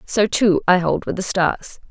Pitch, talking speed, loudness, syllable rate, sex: 195 Hz, 220 wpm, -18 LUFS, 4.1 syllables/s, female